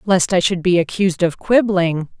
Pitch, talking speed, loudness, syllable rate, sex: 185 Hz, 190 wpm, -17 LUFS, 5.0 syllables/s, female